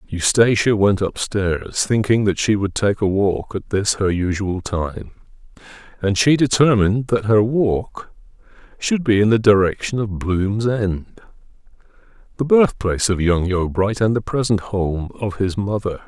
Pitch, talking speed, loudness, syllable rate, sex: 105 Hz, 155 wpm, -18 LUFS, 4.3 syllables/s, male